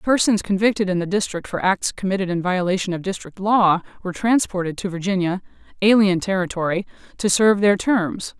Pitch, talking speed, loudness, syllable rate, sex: 190 Hz, 165 wpm, -20 LUFS, 5.8 syllables/s, female